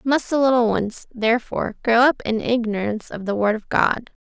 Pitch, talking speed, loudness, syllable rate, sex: 235 Hz, 200 wpm, -20 LUFS, 5.4 syllables/s, female